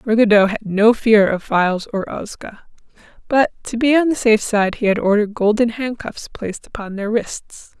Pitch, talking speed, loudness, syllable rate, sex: 220 Hz, 185 wpm, -17 LUFS, 5.0 syllables/s, female